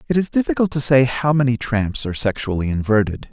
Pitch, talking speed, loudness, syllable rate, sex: 125 Hz, 200 wpm, -19 LUFS, 6.1 syllables/s, male